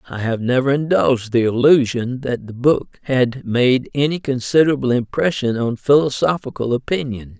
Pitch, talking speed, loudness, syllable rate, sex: 130 Hz, 140 wpm, -18 LUFS, 5.0 syllables/s, male